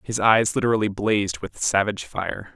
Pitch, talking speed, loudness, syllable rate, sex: 105 Hz, 165 wpm, -22 LUFS, 5.3 syllables/s, male